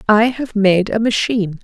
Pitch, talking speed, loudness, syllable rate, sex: 215 Hz, 185 wpm, -16 LUFS, 5.0 syllables/s, female